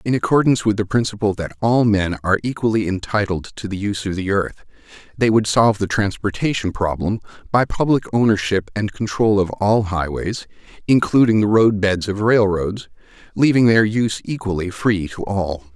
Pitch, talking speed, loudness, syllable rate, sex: 105 Hz, 165 wpm, -18 LUFS, 5.3 syllables/s, male